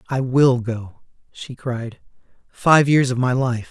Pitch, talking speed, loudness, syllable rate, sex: 125 Hz, 160 wpm, -19 LUFS, 3.6 syllables/s, male